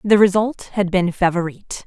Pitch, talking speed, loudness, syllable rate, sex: 190 Hz, 160 wpm, -18 LUFS, 5.2 syllables/s, female